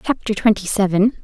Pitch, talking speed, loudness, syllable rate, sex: 210 Hz, 145 wpm, -18 LUFS, 5.8 syllables/s, female